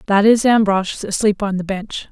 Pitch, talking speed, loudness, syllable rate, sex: 205 Hz, 200 wpm, -17 LUFS, 4.7 syllables/s, female